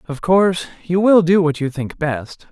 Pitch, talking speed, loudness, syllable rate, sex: 165 Hz, 215 wpm, -17 LUFS, 4.5 syllables/s, male